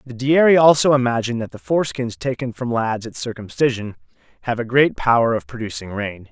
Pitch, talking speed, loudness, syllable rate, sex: 120 Hz, 180 wpm, -19 LUFS, 5.8 syllables/s, male